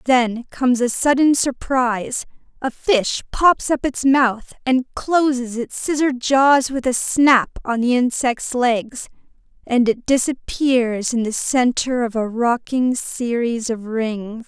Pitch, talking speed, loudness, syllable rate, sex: 250 Hz, 145 wpm, -19 LUFS, 3.6 syllables/s, female